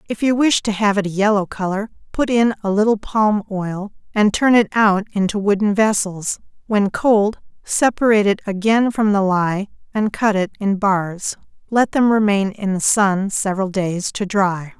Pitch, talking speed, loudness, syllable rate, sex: 205 Hz, 180 wpm, -18 LUFS, 4.6 syllables/s, female